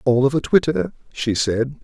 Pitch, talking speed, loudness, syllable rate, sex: 135 Hz, 195 wpm, -20 LUFS, 4.7 syllables/s, male